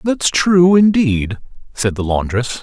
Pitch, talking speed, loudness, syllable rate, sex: 145 Hz, 135 wpm, -14 LUFS, 3.7 syllables/s, male